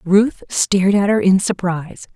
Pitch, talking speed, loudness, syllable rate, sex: 195 Hz, 165 wpm, -16 LUFS, 4.6 syllables/s, female